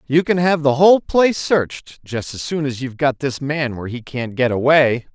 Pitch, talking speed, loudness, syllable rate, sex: 140 Hz, 235 wpm, -18 LUFS, 5.3 syllables/s, male